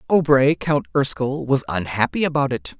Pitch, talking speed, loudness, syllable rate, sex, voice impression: 135 Hz, 150 wpm, -20 LUFS, 4.8 syllables/s, male, masculine, adult-like, tensed, powerful, bright, clear, fluent, slightly nasal, intellectual, calm, friendly, reassuring, slightly unique, slightly wild, lively, slightly kind